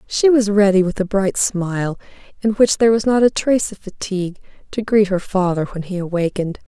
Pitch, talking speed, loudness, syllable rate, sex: 195 Hz, 205 wpm, -18 LUFS, 5.8 syllables/s, female